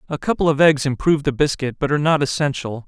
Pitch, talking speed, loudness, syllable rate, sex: 145 Hz, 230 wpm, -19 LUFS, 6.8 syllables/s, male